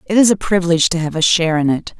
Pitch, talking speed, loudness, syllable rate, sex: 175 Hz, 300 wpm, -15 LUFS, 7.5 syllables/s, female